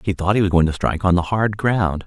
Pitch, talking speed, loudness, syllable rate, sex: 95 Hz, 320 wpm, -19 LUFS, 6.1 syllables/s, male